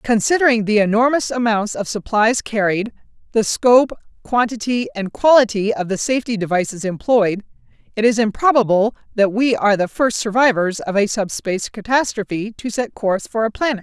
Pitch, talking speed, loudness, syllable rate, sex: 220 Hz, 155 wpm, -17 LUFS, 5.4 syllables/s, female